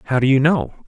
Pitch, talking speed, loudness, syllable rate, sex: 135 Hz, 275 wpm, -17 LUFS, 7.4 syllables/s, male